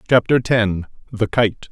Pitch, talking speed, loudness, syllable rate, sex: 110 Hz, 105 wpm, -18 LUFS, 4.0 syllables/s, male